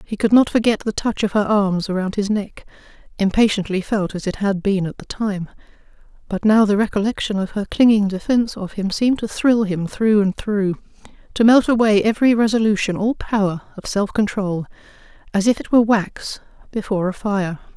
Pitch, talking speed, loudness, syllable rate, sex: 205 Hz, 185 wpm, -19 LUFS, 5.4 syllables/s, female